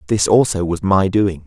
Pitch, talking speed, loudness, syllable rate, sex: 95 Hz, 205 wpm, -16 LUFS, 4.7 syllables/s, male